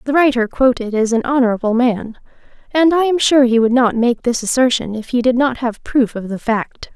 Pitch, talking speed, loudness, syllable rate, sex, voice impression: 245 Hz, 225 wpm, -16 LUFS, 5.3 syllables/s, female, feminine, adult-like, relaxed, slightly weak, soft, raspy, slightly cute, refreshing, friendly, slightly lively, kind, modest